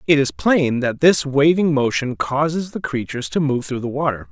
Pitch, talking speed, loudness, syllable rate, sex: 145 Hz, 210 wpm, -19 LUFS, 5.1 syllables/s, male